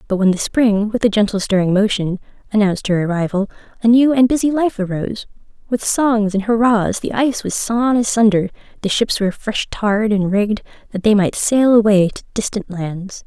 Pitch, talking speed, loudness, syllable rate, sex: 210 Hz, 190 wpm, -17 LUFS, 5.4 syllables/s, female